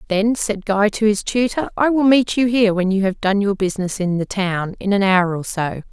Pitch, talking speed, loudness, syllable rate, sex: 205 Hz, 255 wpm, -18 LUFS, 5.2 syllables/s, female